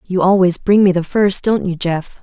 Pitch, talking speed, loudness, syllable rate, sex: 185 Hz, 245 wpm, -14 LUFS, 4.7 syllables/s, female